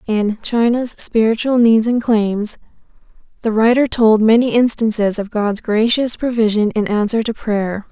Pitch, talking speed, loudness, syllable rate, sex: 220 Hz, 145 wpm, -15 LUFS, 4.4 syllables/s, female